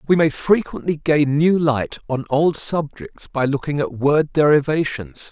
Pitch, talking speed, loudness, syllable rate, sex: 150 Hz, 160 wpm, -19 LUFS, 4.2 syllables/s, male